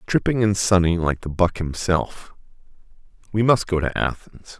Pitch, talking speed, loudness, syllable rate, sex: 95 Hz, 155 wpm, -21 LUFS, 4.6 syllables/s, male